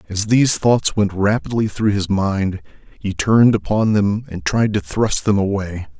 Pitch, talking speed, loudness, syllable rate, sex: 100 Hz, 180 wpm, -17 LUFS, 4.5 syllables/s, male